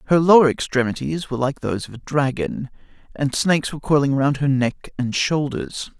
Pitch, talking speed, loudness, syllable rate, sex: 140 Hz, 180 wpm, -20 LUFS, 5.5 syllables/s, male